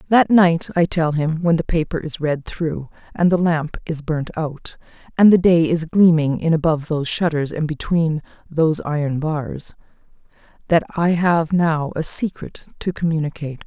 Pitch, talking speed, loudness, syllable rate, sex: 160 Hz, 170 wpm, -19 LUFS, 4.7 syllables/s, female